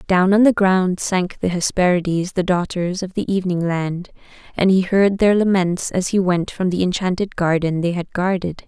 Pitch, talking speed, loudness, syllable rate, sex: 185 Hz, 195 wpm, -18 LUFS, 4.9 syllables/s, female